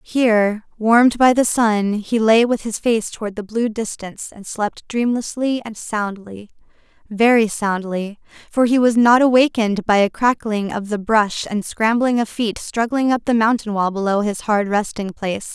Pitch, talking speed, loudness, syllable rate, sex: 220 Hz, 175 wpm, -18 LUFS, 4.6 syllables/s, female